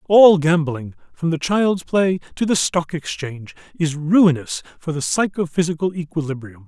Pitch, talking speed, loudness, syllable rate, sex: 165 Hz, 145 wpm, -19 LUFS, 4.6 syllables/s, male